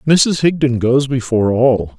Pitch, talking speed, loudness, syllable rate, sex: 130 Hz, 150 wpm, -14 LUFS, 4.3 syllables/s, male